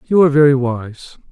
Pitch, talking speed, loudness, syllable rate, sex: 140 Hz, 185 wpm, -13 LUFS, 5.8 syllables/s, male